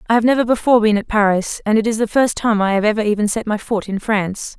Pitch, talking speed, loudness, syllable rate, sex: 215 Hz, 290 wpm, -17 LUFS, 6.7 syllables/s, female